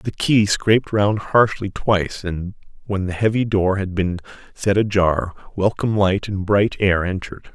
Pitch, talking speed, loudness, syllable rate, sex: 100 Hz, 165 wpm, -19 LUFS, 4.6 syllables/s, male